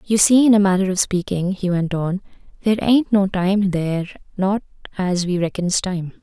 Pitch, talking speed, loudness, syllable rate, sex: 190 Hz, 195 wpm, -19 LUFS, 5.0 syllables/s, female